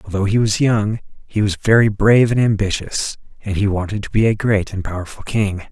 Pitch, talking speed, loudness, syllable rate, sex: 105 Hz, 220 wpm, -18 LUFS, 5.7 syllables/s, male